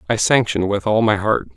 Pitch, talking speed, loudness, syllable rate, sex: 110 Hz, 230 wpm, -17 LUFS, 5.3 syllables/s, male